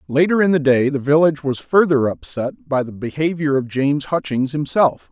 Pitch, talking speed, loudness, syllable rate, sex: 145 Hz, 190 wpm, -18 LUFS, 5.3 syllables/s, male